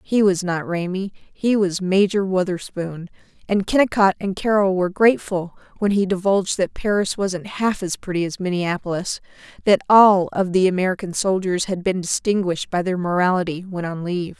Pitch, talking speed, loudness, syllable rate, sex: 185 Hz, 165 wpm, -20 LUFS, 5.2 syllables/s, female